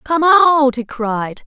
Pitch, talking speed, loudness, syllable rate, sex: 270 Hz, 165 wpm, -14 LUFS, 2.9 syllables/s, female